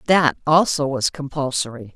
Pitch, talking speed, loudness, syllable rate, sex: 140 Hz, 125 wpm, -20 LUFS, 4.8 syllables/s, female